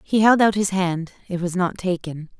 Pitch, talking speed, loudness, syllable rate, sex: 185 Hz, 225 wpm, -21 LUFS, 4.7 syllables/s, female